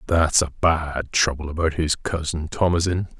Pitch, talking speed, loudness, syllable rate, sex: 80 Hz, 150 wpm, -22 LUFS, 4.6 syllables/s, male